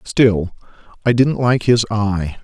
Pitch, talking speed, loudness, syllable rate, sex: 110 Hz, 150 wpm, -16 LUFS, 3.5 syllables/s, male